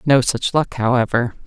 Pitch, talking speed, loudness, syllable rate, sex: 125 Hz, 165 wpm, -18 LUFS, 4.7 syllables/s, female